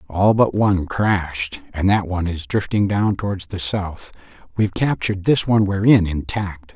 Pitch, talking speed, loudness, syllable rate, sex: 95 Hz, 180 wpm, -19 LUFS, 5.2 syllables/s, male